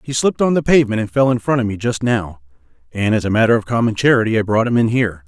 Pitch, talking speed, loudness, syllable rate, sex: 120 Hz, 285 wpm, -16 LUFS, 7.1 syllables/s, male